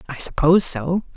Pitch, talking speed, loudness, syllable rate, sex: 165 Hz, 155 wpm, -18 LUFS, 5.8 syllables/s, female